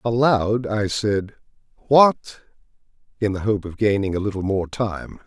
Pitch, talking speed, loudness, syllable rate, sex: 105 Hz, 150 wpm, -21 LUFS, 4.2 syllables/s, male